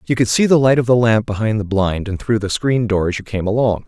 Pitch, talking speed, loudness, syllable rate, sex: 110 Hz, 310 wpm, -16 LUFS, 5.9 syllables/s, male